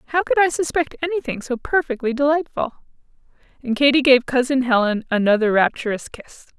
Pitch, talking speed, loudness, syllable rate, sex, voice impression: 265 Hz, 145 wpm, -19 LUFS, 5.6 syllables/s, female, feminine, adult-like, slightly relaxed, bright, soft, slightly muffled, slightly raspy, friendly, reassuring, unique, lively, kind, slightly modest